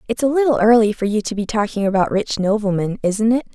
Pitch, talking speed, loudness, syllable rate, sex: 215 Hz, 235 wpm, -18 LUFS, 6.2 syllables/s, female